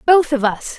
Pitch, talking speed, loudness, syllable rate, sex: 280 Hz, 230 wpm, -16 LUFS, 4.6 syllables/s, female